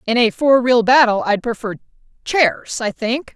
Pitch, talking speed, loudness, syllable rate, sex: 235 Hz, 180 wpm, -16 LUFS, 4.4 syllables/s, female